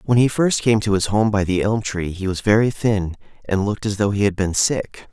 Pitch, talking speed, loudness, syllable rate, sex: 105 Hz, 270 wpm, -19 LUFS, 5.3 syllables/s, male